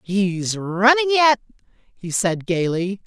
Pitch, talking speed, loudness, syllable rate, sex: 210 Hz, 115 wpm, -19 LUFS, 3.1 syllables/s, female